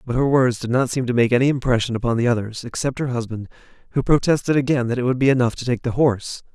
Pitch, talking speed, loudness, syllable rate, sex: 125 Hz, 255 wpm, -20 LUFS, 6.9 syllables/s, male